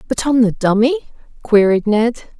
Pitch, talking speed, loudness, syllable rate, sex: 235 Hz, 150 wpm, -15 LUFS, 4.7 syllables/s, female